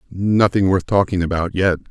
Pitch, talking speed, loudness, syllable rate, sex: 95 Hz, 155 wpm, -18 LUFS, 5.0 syllables/s, male